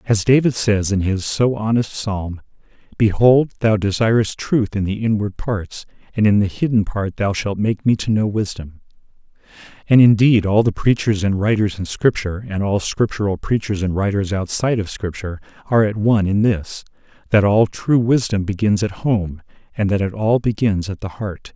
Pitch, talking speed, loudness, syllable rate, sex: 105 Hz, 185 wpm, -18 LUFS, 5.0 syllables/s, male